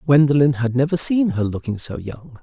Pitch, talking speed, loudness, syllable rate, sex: 135 Hz, 200 wpm, -18 LUFS, 5.2 syllables/s, male